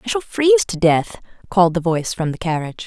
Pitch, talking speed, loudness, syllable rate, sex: 185 Hz, 230 wpm, -18 LUFS, 7.0 syllables/s, female